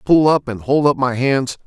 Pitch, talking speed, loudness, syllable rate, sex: 135 Hz, 250 wpm, -16 LUFS, 4.6 syllables/s, male